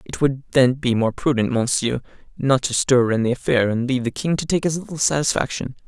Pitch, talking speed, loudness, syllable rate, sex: 130 Hz, 225 wpm, -20 LUFS, 5.8 syllables/s, male